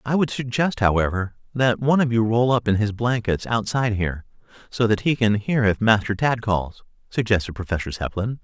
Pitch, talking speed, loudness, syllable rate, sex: 110 Hz, 190 wpm, -21 LUFS, 5.5 syllables/s, male